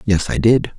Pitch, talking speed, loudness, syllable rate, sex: 105 Hz, 230 wpm, -16 LUFS, 4.5 syllables/s, male